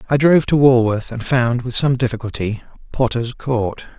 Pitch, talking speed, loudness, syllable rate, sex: 125 Hz, 165 wpm, -17 LUFS, 5.0 syllables/s, male